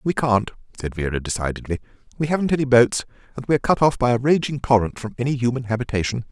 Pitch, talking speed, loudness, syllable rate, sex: 125 Hz, 200 wpm, -21 LUFS, 6.7 syllables/s, male